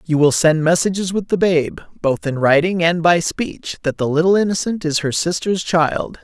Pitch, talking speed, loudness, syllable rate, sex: 170 Hz, 185 wpm, -17 LUFS, 4.8 syllables/s, male